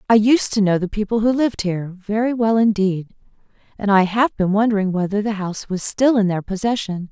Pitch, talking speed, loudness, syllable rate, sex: 205 Hz, 195 wpm, -19 LUFS, 5.8 syllables/s, female